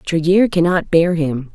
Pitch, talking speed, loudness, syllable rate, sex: 170 Hz, 155 wpm, -15 LUFS, 4.2 syllables/s, female